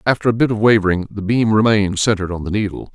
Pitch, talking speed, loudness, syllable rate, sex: 105 Hz, 245 wpm, -17 LUFS, 7.1 syllables/s, male